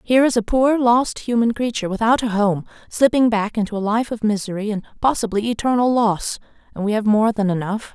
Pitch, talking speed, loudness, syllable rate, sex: 220 Hz, 205 wpm, -19 LUFS, 5.8 syllables/s, female